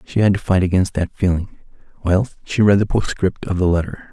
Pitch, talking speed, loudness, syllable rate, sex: 95 Hz, 220 wpm, -18 LUFS, 5.4 syllables/s, male